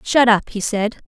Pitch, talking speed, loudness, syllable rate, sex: 220 Hz, 225 wpm, -17 LUFS, 4.6 syllables/s, female